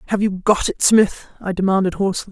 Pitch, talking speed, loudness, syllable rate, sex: 195 Hz, 205 wpm, -18 LUFS, 6.2 syllables/s, female